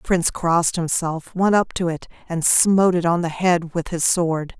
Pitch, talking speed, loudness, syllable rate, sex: 170 Hz, 220 wpm, -19 LUFS, 4.9 syllables/s, female